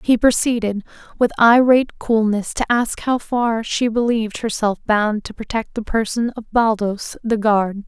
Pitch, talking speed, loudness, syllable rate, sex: 225 Hz, 160 wpm, -18 LUFS, 4.5 syllables/s, female